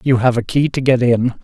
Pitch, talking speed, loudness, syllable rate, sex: 125 Hz, 295 wpm, -15 LUFS, 5.3 syllables/s, male